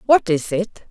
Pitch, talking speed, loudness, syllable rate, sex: 200 Hz, 200 wpm, -19 LUFS, 3.9 syllables/s, female